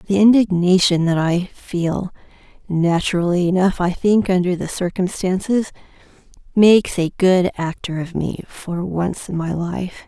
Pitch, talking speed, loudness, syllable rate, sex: 180 Hz, 125 wpm, -18 LUFS, 4.3 syllables/s, female